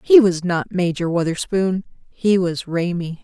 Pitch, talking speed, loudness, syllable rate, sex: 185 Hz, 150 wpm, -19 LUFS, 4.2 syllables/s, female